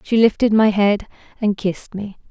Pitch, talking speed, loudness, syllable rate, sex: 205 Hz, 180 wpm, -18 LUFS, 5.1 syllables/s, female